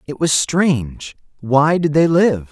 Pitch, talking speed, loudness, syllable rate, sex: 150 Hz, 145 wpm, -16 LUFS, 3.7 syllables/s, male